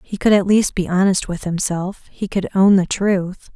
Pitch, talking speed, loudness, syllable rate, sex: 190 Hz, 220 wpm, -17 LUFS, 4.5 syllables/s, female